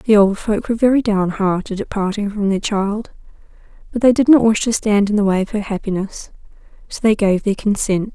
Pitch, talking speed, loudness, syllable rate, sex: 205 Hz, 220 wpm, -17 LUFS, 5.5 syllables/s, female